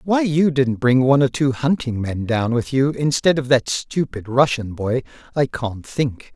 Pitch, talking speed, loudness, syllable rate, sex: 130 Hz, 200 wpm, -19 LUFS, 4.4 syllables/s, male